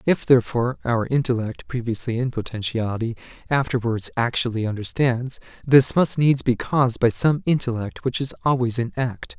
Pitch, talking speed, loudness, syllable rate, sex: 125 Hz, 145 wpm, -22 LUFS, 5.2 syllables/s, male